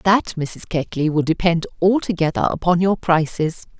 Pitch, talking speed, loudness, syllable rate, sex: 170 Hz, 140 wpm, -19 LUFS, 4.8 syllables/s, female